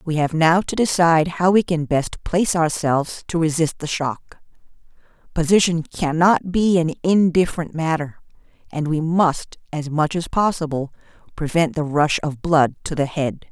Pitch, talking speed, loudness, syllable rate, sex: 160 Hz, 160 wpm, -19 LUFS, 4.7 syllables/s, female